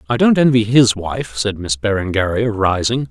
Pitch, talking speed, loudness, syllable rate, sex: 110 Hz, 175 wpm, -16 LUFS, 4.8 syllables/s, male